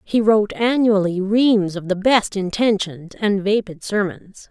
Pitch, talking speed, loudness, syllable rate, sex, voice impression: 205 Hz, 145 wpm, -19 LUFS, 4.3 syllables/s, female, feminine, adult-like, slightly clear, fluent, calm, elegant